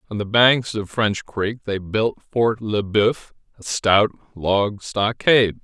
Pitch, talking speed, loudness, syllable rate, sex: 105 Hz, 160 wpm, -20 LUFS, 3.6 syllables/s, male